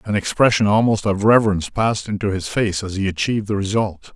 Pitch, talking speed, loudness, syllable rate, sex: 100 Hz, 200 wpm, -19 LUFS, 6.2 syllables/s, male